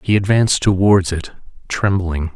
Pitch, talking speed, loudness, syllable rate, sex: 95 Hz, 125 wpm, -16 LUFS, 4.6 syllables/s, male